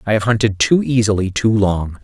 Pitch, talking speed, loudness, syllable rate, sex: 105 Hz, 205 wpm, -16 LUFS, 5.3 syllables/s, male